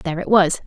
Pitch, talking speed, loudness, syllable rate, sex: 180 Hz, 270 wpm, -17 LUFS, 6.6 syllables/s, female